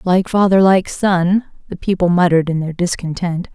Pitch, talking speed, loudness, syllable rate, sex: 180 Hz, 170 wpm, -16 LUFS, 5.0 syllables/s, female